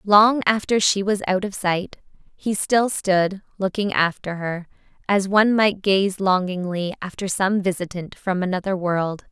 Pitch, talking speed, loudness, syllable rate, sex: 190 Hz, 155 wpm, -21 LUFS, 4.3 syllables/s, female